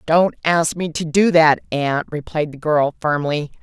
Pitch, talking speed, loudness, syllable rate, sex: 155 Hz, 180 wpm, -18 LUFS, 4.1 syllables/s, female